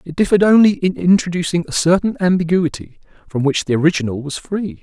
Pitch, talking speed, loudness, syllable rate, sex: 170 Hz, 175 wpm, -16 LUFS, 6.1 syllables/s, male